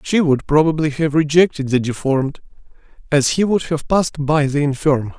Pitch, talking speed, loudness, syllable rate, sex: 150 Hz, 175 wpm, -17 LUFS, 5.2 syllables/s, male